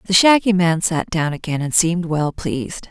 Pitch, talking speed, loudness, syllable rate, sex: 175 Hz, 205 wpm, -18 LUFS, 5.1 syllables/s, female